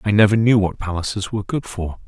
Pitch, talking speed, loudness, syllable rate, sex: 100 Hz, 230 wpm, -19 LUFS, 6.2 syllables/s, male